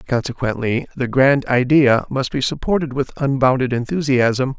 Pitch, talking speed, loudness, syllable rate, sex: 130 Hz, 130 wpm, -18 LUFS, 4.7 syllables/s, male